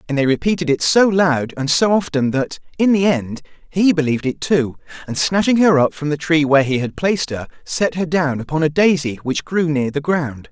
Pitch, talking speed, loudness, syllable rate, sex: 155 Hz, 230 wpm, -17 LUFS, 5.3 syllables/s, male